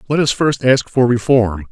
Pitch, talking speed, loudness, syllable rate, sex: 125 Hz, 210 wpm, -15 LUFS, 4.6 syllables/s, male